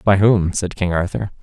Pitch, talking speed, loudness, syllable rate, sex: 95 Hz, 210 wpm, -18 LUFS, 4.8 syllables/s, male